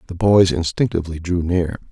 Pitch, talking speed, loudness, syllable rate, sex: 90 Hz, 155 wpm, -18 LUFS, 5.5 syllables/s, male